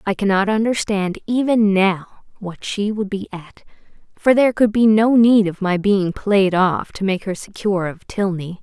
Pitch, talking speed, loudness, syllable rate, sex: 200 Hz, 190 wpm, -18 LUFS, 4.5 syllables/s, female